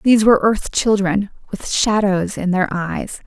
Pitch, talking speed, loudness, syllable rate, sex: 200 Hz, 165 wpm, -17 LUFS, 4.4 syllables/s, female